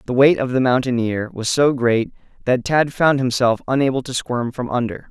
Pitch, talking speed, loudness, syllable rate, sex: 125 Hz, 200 wpm, -18 LUFS, 5.1 syllables/s, male